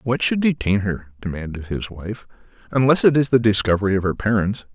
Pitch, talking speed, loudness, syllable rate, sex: 110 Hz, 190 wpm, -20 LUFS, 5.7 syllables/s, male